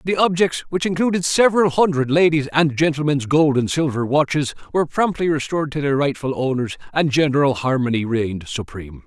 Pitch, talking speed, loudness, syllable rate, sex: 145 Hz, 165 wpm, -19 LUFS, 3.7 syllables/s, male